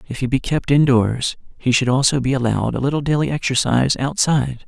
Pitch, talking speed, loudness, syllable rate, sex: 130 Hz, 195 wpm, -18 LUFS, 6.0 syllables/s, male